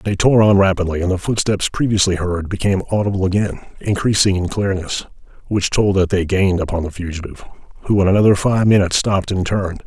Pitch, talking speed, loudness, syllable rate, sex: 95 Hz, 190 wpm, -17 LUFS, 6.5 syllables/s, male